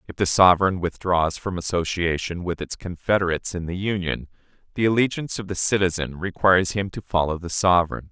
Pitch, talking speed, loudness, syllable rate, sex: 90 Hz, 170 wpm, -22 LUFS, 5.9 syllables/s, male